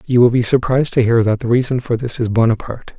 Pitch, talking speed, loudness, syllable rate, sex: 120 Hz, 260 wpm, -16 LUFS, 6.7 syllables/s, male